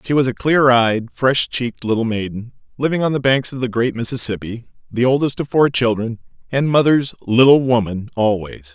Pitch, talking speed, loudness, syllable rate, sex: 125 Hz, 185 wpm, -17 LUFS, 5.2 syllables/s, male